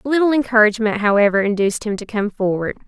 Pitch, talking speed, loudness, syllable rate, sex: 220 Hz, 190 wpm, -17 LUFS, 7.1 syllables/s, female